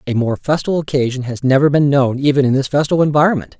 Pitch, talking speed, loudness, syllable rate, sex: 140 Hz, 215 wpm, -15 LUFS, 6.4 syllables/s, male